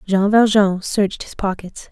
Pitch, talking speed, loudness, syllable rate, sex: 200 Hz, 155 wpm, -17 LUFS, 4.5 syllables/s, female